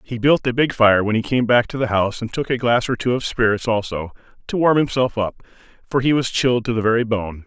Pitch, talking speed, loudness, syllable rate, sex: 115 Hz, 265 wpm, -19 LUFS, 6.0 syllables/s, male